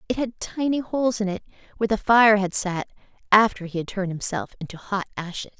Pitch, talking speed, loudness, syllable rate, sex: 205 Hz, 205 wpm, -23 LUFS, 6.1 syllables/s, female